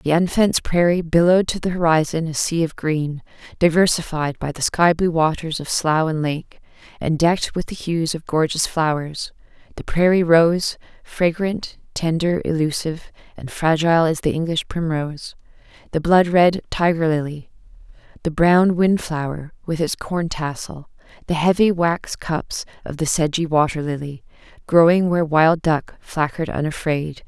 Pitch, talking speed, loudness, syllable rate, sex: 165 Hz, 145 wpm, -19 LUFS, 4.6 syllables/s, female